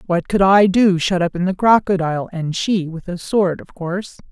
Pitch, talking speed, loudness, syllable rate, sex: 185 Hz, 220 wpm, -17 LUFS, 4.9 syllables/s, female